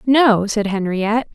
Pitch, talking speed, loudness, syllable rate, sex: 220 Hz, 135 wpm, -17 LUFS, 4.2 syllables/s, female